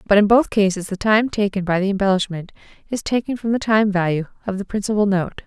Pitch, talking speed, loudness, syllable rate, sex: 200 Hz, 220 wpm, -19 LUFS, 6.1 syllables/s, female